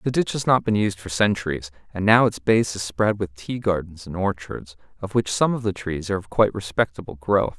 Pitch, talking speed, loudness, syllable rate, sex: 100 Hz, 235 wpm, -22 LUFS, 5.5 syllables/s, male